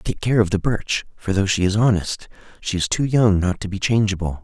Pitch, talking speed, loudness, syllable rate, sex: 100 Hz, 245 wpm, -20 LUFS, 5.3 syllables/s, male